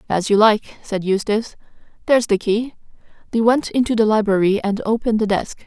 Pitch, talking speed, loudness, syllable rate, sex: 215 Hz, 180 wpm, -18 LUFS, 5.8 syllables/s, female